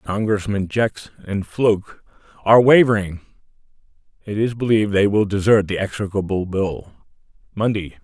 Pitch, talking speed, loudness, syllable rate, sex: 100 Hz, 120 wpm, -19 LUFS, 5.2 syllables/s, male